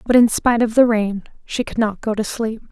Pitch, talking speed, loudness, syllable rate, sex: 225 Hz, 265 wpm, -18 LUFS, 5.6 syllables/s, female